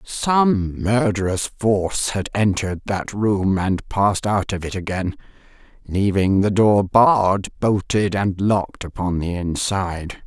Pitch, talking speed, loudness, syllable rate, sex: 100 Hz, 135 wpm, -20 LUFS, 4.0 syllables/s, female